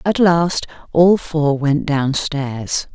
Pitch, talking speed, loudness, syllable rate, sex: 155 Hz, 120 wpm, -17 LUFS, 2.7 syllables/s, female